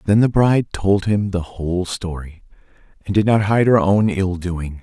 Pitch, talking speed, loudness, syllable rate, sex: 95 Hz, 200 wpm, -18 LUFS, 4.7 syllables/s, male